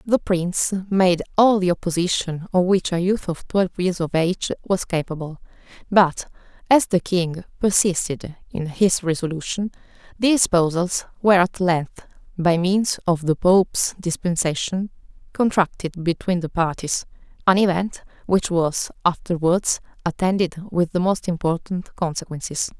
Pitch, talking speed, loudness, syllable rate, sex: 180 Hz, 135 wpm, -21 LUFS, 4.6 syllables/s, female